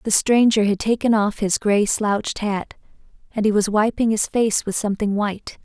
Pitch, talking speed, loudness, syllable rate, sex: 210 Hz, 190 wpm, -20 LUFS, 5.1 syllables/s, female